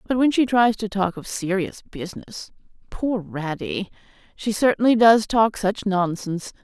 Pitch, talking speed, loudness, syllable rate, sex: 205 Hz, 145 wpm, -21 LUFS, 4.6 syllables/s, female